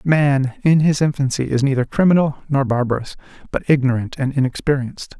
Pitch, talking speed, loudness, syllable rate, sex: 140 Hz, 150 wpm, -18 LUFS, 5.7 syllables/s, male